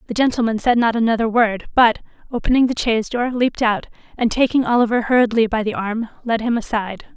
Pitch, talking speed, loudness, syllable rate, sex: 230 Hz, 195 wpm, -18 LUFS, 6.2 syllables/s, female